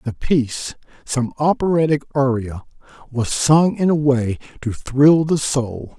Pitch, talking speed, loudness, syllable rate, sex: 135 Hz, 120 wpm, -18 LUFS, 4.0 syllables/s, male